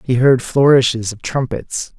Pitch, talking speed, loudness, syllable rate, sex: 125 Hz, 150 wpm, -15 LUFS, 4.3 syllables/s, male